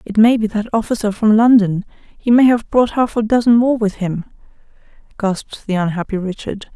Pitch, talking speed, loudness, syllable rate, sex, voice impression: 215 Hz, 185 wpm, -16 LUFS, 5.4 syllables/s, female, very feminine, slightly young, very thin, slightly relaxed, slightly weak, dark, soft, clear, slightly fluent, slightly raspy, cute, intellectual, refreshing, very sincere, calm, friendly, reassuring, unique, very elegant, sweet, slightly lively, very kind, very modest